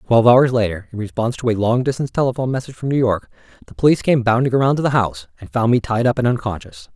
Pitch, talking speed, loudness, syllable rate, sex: 120 Hz, 250 wpm, -18 LUFS, 7.6 syllables/s, male